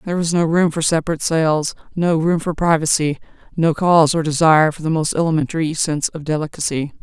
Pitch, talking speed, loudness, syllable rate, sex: 160 Hz, 190 wpm, -17 LUFS, 6.2 syllables/s, female